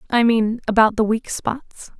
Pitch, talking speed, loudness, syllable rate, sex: 225 Hz, 180 wpm, -19 LUFS, 4.2 syllables/s, female